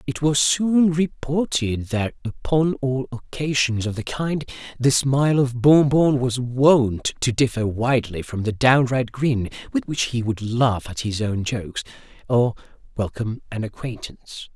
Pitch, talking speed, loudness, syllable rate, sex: 125 Hz, 155 wpm, -21 LUFS, 4.3 syllables/s, male